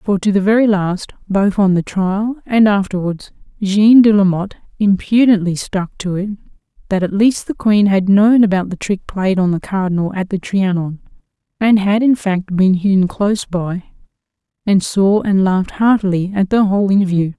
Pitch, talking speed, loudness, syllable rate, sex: 195 Hz, 180 wpm, -15 LUFS, 5.0 syllables/s, female